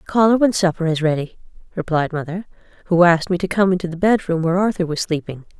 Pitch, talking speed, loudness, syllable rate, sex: 175 Hz, 215 wpm, -18 LUFS, 6.4 syllables/s, female